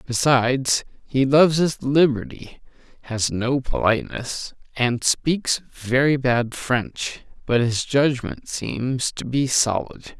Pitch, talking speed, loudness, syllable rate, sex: 130 Hz, 120 wpm, -21 LUFS, 3.5 syllables/s, male